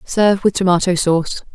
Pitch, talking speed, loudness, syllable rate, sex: 185 Hz, 155 wpm, -15 LUFS, 5.8 syllables/s, female